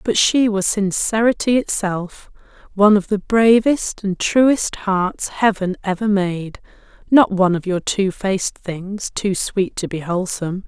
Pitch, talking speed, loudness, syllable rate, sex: 200 Hz, 145 wpm, -18 LUFS, 4.5 syllables/s, female